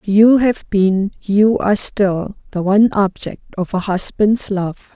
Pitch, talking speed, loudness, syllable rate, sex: 200 Hz, 155 wpm, -16 LUFS, 3.9 syllables/s, female